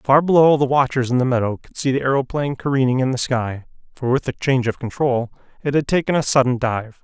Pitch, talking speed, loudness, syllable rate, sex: 130 Hz, 230 wpm, -19 LUFS, 6.1 syllables/s, male